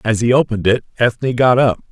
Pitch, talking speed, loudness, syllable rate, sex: 120 Hz, 220 wpm, -15 LUFS, 6.2 syllables/s, male